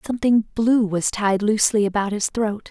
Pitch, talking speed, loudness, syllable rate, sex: 210 Hz, 175 wpm, -20 LUFS, 5.1 syllables/s, female